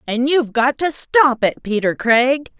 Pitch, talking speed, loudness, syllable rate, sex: 255 Hz, 185 wpm, -16 LUFS, 4.4 syllables/s, female